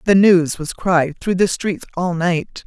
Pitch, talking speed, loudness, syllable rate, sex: 175 Hz, 205 wpm, -17 LUFS, 3.7 syllables/s, female